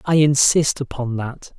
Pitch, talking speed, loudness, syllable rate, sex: 135 Hz, 150 wpm, -18 LUFS, 4.0 syllables/s, male